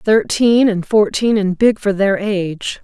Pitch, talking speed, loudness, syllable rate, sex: 205 Hz, 170 wpm, -15 LUFS, 3.9 syllables/s, female